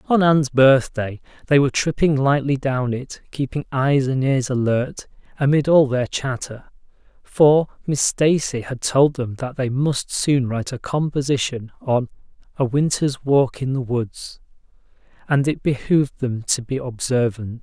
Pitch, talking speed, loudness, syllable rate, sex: 135 Hz, 155 wpm, -20 LUFS, 4.4 syllables/s, male